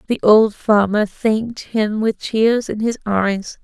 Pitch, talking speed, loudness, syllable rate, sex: 215 Hz, 165 wpm, -17 LUFS, 3.6 syllables/s, female